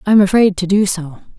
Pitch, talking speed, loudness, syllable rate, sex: 190 Hz, 260 wpm, -14 LUFS, 6.4 syllables/s, female